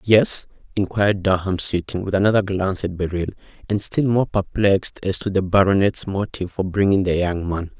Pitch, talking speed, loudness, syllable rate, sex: 95 Hz, 175 wpm, -20 LUFS, 5.5 syllables/s, male